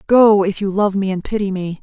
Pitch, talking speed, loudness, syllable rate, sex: 200 Hz, 265 wpm, -16 LUFS, 5.4 syllables/s, female